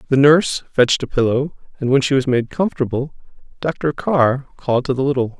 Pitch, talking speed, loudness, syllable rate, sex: 135 Hz, 200 wpm, -18 LUFS, 5.9 syllables/s, male